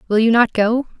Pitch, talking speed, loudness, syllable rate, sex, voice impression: 230 Hz, 240 wpm, -16 LUFS, 5.6 syllables/s, female, very feminine, slightly young, adult-like, thin, tensed, slightly weak, bright, hard, very clear, fluent, slightly raspy, cute, slightly cool, intellectual, very refreshing, sincere, calm, friendly, reassuring, slightly elegant, wild, sweet, lively, kind, slightly intense, slightly sharp, slightly modest